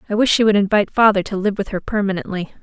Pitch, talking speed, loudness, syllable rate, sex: 200 Hz, 250 wpm, -17 LUFS, 7.3 syllables/s, female